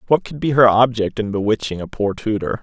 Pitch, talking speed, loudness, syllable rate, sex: 115 Hz, 230 wpm, -18 LUFS, 5.7 syllables/s, male